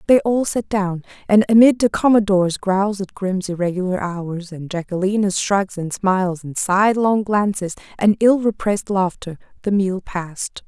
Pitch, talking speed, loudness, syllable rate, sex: 195 Hz, 155 wpm, -19 LUFS, 4.7 syllables/s, female